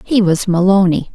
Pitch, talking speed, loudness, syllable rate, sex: 185 Hz, 155 wpm, -13 LUFS, 4.8 syllables/s, female